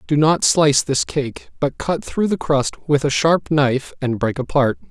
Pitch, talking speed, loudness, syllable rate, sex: 145 Hz, 210 wpm, -18 LUFS, 4.4 syllables/s, male